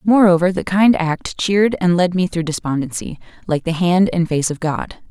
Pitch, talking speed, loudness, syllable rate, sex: 175 Hz, 200 wpm, -17 LUFS, 4.9 syllables/s, female